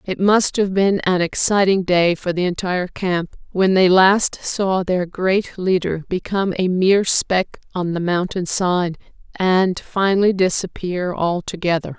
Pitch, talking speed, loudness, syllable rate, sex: 185 Hz, 150 wpm, -18 LUFS, 4.2 syllables/s, female